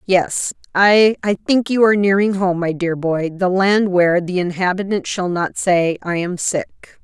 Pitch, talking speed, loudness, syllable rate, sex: 185 Hz, 180 wpm, -17 LUFS, 4.6 syllables/s, female